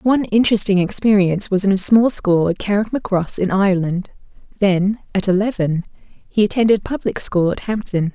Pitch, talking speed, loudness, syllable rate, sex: 200 Hz, 155 wpm, -17 LUFS, 5.3 syllables/s, female